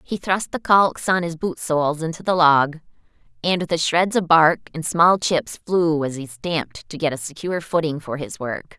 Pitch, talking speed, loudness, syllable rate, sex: 165 Hz, 205 wpm, -20 LUFS, 4.7 syllables/s, female